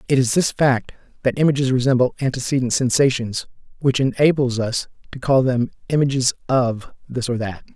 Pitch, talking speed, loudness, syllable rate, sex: 130 Hz, 155 wpm, -20 LUFS, 5.4 syllables/s, male